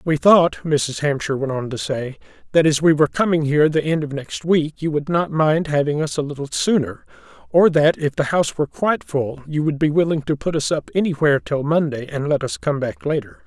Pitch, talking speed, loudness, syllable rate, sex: 150 Hz, 235 wpm, -19 LUFS, 5.7 syllables/s, male